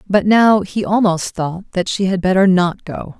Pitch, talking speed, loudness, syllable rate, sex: 195 Hz, 205 wpm, -15 LUFS, 4.4 syllables/s, female